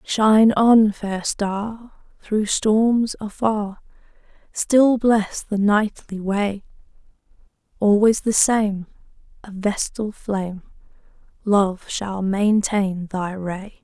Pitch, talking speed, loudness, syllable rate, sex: 205 Hz, 100 wpm, -20 LUFS, 2.9 syllables/s, female